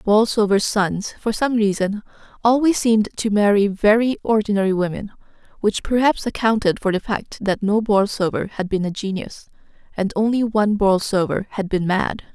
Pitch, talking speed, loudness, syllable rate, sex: 210 Hz, 155 wpm, -19 LUFS, 5.0 syllables/s, female